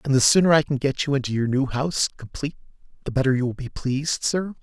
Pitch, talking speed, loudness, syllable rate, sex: 135 Hz, 245 wpm, -22 LUFS, 6.6 syllables/s, male